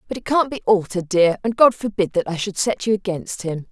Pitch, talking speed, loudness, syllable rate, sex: 200 Hz, 260 wpm, -20 LUFS, 5.8 syllables/s, female